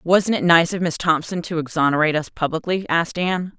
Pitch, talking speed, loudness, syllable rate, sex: 170 Hz, 200 wpm, -20 LUFS, 6.0 syllables/s, female